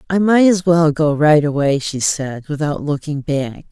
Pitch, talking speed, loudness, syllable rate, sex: 155 Hz, 195 wpm, -16 LUFS, 4.3 syllables/s, female